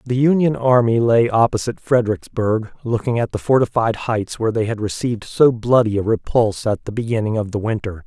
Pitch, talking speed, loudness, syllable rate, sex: 115 Hz, 185 wpm, -18 LUFS, 5.8 syllables/s, male